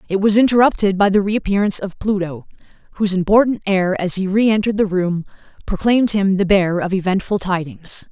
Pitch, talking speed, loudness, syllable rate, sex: 195 Hz, 170 wpm, -17 LUFS, 6.0 syllables/s, female